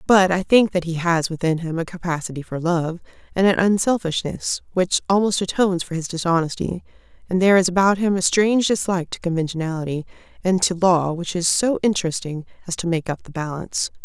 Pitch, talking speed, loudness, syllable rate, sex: 175 Hz, 190 wpm, -20 LUFS, 5.9 syllables/s, female